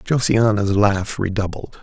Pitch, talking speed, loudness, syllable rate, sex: 105 Hz, 100 wpm, -19 LUFS, 3.9 syllables/s, male